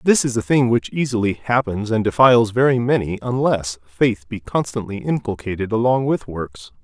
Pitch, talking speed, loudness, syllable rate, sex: 115 Hz, 165 wpm, -19 LUFS, 5.0 syllables/s, male